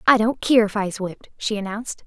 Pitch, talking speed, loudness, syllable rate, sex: 215 Hz, 260 wpm, -22 LUFS, 6.4 syllables/s, female